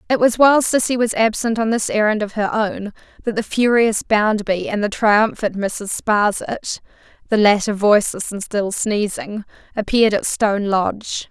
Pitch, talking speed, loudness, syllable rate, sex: 215 Hz, 165 wpm, -18 LUFS, 4.8 syllables/s, female